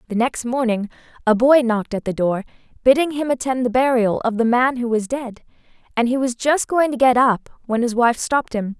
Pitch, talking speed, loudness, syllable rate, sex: 245 Hz, 225 wpm, -19 LUFS, 5.5 syllables/s, female